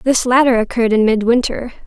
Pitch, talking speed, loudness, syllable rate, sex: 240 Hz, 160 wpm, -14 LUFS, 5.8 syllables/s, female